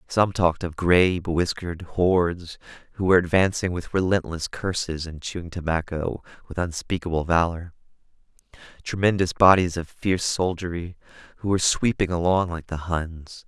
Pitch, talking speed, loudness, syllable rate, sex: 85 Hz, 135 wpm, -23 LUFS, 5.1 syllables/s, male